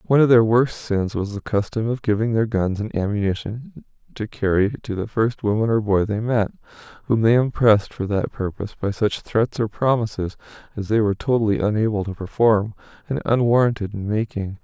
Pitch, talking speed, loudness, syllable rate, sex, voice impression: 110 Hz, 190 wpm, -21 LUFS, 5.5 syllables/s, male, masculine, adult-like, slightly relaxed, slightly powerful, soft, muffled, intellectual, calm, friendly, reassuring, slightly lively, kind, slightly modest